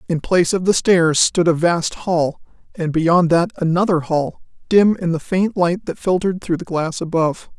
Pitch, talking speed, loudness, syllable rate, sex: 170 Hz, 200 wpm, -18 LUFS, 4.8 syllables/s, female